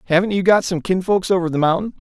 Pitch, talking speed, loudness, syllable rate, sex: 180 Hz, 230 wpm, -18 LUFS, 6.8 syllables/s, male